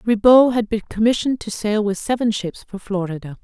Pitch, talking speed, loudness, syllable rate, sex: 215 Hz, 190 wpm, -19 LUFS, 5.6 syllables/s, female